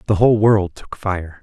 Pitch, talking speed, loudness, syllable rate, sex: 100 Hz, 210 wpm, -17 LUFS, 4.8 syllables/s, male